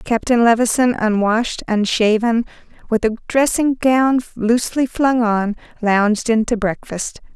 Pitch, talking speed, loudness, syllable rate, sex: 230 Hz, 120 wpm, -17 LUFS, 4.4 syllables/s, female